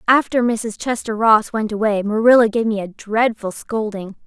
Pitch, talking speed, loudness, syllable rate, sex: 220 Hz, 170 wpm, -18 LUFS, 4.7 syllables/s, female